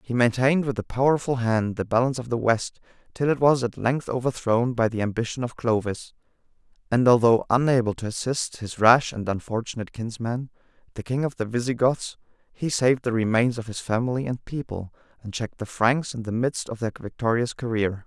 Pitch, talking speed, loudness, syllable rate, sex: 120 Hz, 190 wpm, -24 LUFS, 5.6 syllables/s, male